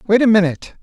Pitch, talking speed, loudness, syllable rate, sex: 205 Hz, 220 wpm, -15 LUFS, 7.5 syllables/s, male